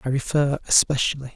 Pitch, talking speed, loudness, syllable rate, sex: 135 Hz, 135 wpm, -21 LUFS, 6.0 syllables/s, male